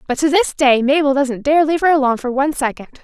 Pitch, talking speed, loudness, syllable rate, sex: 280 Hz, 255 wpm, -15 LUFS, 6.6 syllables/s, female